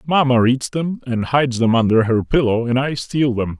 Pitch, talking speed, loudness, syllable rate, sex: 125 Hz, 215 wpm, -17 LUFS, 5.0 syllables/s, male